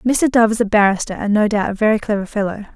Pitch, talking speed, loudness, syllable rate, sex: 210 Hz, 260 wpm, -17 LUFS, 6.4 syllables/s, female